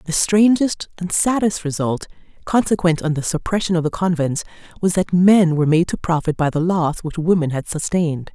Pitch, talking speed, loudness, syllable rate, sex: 170 Hz, 185 wpm, -18 LUFS, 5.3 syllables/s, female